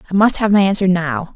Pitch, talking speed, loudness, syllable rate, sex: 190 Hz, 265 wpm, -15 LUFS, 6.2 syllables/s, female